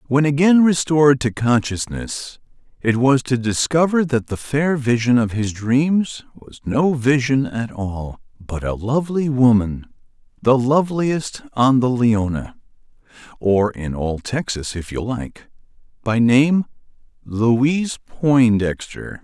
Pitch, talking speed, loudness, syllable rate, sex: 125 Hz, 120 wpm, -18 LUFS, 3.9 syllables/s, male